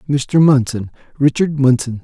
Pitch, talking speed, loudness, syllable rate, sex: 135 Hz, 120 wpm, -15 LUFS, 4.5 syllables/s, male